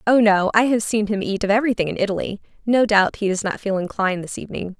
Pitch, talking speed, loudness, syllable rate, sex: 205 Hz, 250 wpm, -20 LUFS, 6.6 syllables/s, female